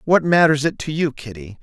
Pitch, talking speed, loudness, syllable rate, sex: 145 Hz, 220 wpm, -18 LUFS, 5.3 syllables/s, male